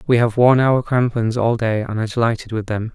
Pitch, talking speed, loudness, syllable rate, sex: 115 Hz, 245 wpm, -18 LUFS, 5.8 syllables/s, male